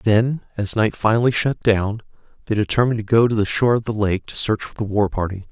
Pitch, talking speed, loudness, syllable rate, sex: 110 Hz, 240 wpm, -20 LUFS, 5.9 syllables/s, male